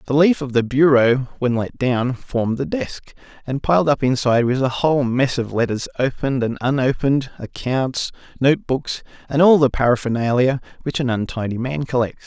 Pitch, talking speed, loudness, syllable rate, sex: 130 Hz, 175 wpm, -19 LUFS, 5.3 syllables/s, male